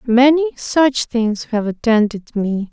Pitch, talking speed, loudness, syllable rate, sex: 240 Hz, 130 wpm, -17 LUFS, 3.5 syllables/s, female